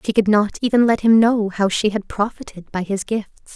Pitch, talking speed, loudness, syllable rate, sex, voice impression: 210 Hz, 235 wpm, -18 LUFS, 5.5 syllables/s, female, feminine, adult-like, slightly cute, calm